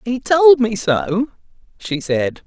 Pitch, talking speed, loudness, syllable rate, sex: 215 Hz, 145 wpm, -16 LUFS, 3.2 syllables/s, male